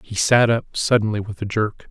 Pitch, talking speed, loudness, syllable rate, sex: 105 Hz, 220 wpm, -19 LUFS, 5.0 syllables/s, male